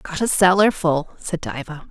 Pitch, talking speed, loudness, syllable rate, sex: 170 Hz, 190 wpm, -19 LUFS, 4.5 syllables/s, female